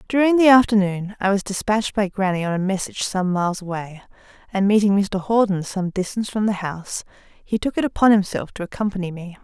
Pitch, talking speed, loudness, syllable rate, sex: 200 Hz, 195 wpm, -20 LUFS, 6.0 syllables/s, female